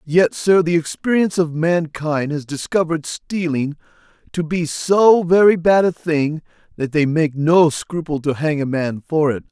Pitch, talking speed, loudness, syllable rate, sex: 160 Hz, 170 wpm, -18 LUFS, 4.4 syllables/s, male